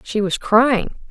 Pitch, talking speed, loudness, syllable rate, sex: 220 Hz, 165 wpm, -17 LUFS, 3.2 syllables/s, female